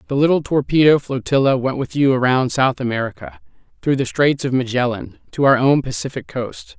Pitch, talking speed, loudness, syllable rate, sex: 135 Hz, 175 wpm, -18 LUFS, 5.4 syllables/s, male